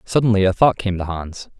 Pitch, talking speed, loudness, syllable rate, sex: 100 Hz, 225 wpm, -18 LUFS, 5.6 syllables/s, male